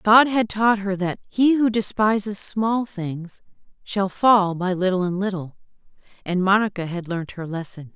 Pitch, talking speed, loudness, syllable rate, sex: 195 Hz, 165 wpm, -21 LUFS, 4.3 syllables/s, female